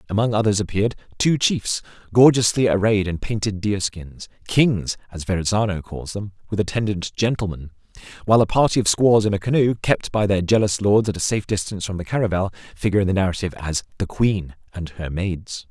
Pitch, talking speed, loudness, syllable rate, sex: 100 Hz, 185 wpm, -21 LUFS, 5.9 syllables/s, male